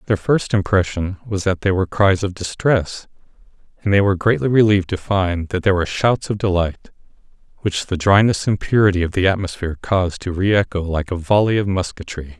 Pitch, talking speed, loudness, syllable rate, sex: 95 Hz, 195 wpm, -18 LUFS, 5.7 syllables/s, male